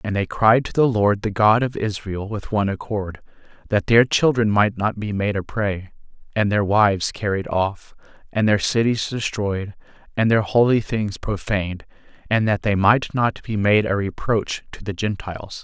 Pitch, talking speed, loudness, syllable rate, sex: 105 Hz, 185 wpm, -20 LUFS, 4.7 syllables/s, male